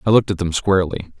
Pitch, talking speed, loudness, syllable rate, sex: 90 Hz, 250 wpm, -18 LUFS, 7.7 syllables/s, male